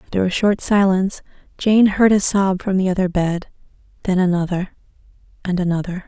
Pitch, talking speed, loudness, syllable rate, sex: 190 Hz, 160 wpm, -18 LUFS, 5.5 syllables/s, female